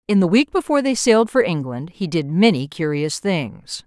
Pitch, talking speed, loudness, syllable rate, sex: 185 Hz, 200 wpm, -19 LUFS, 5.2 syllables/s, female